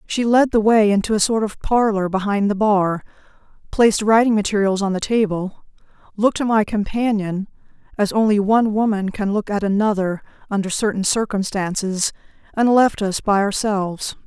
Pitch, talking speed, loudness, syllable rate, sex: 205 Hz, 160 wpm, -19 LUFS, 5.2 syllables/s, female